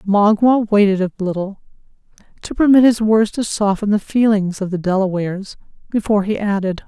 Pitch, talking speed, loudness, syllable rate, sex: 205 Hz, 155 wpm, -16 LUFS, 5.4 syllables/s, female